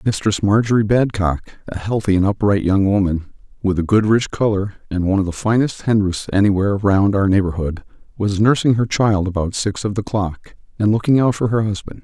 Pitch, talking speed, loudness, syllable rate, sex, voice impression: 100 Hz, 200 wpm, -18 LUFS, 5.6 syllables/s, male, very masculine, very adult-like, very middle-aged, very thick, tensed, very powerful, bright, slightly soft, slightly muffled, fluent, slightly raspy, very cool, intellectual, sincere, very calm, very mature, very friendly, very reassuring, slightly unique, wild, kind, slightly modest